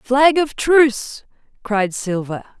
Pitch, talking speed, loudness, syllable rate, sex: 245 Hz, 115 wpm, -17 LUFS, 3.5 syllables/s, female